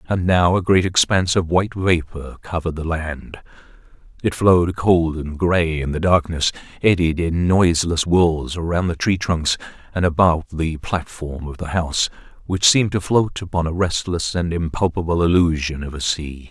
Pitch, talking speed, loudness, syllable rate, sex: 85 Hz, 170 wpm, -19 LUFS, 4.8 syllables/s, male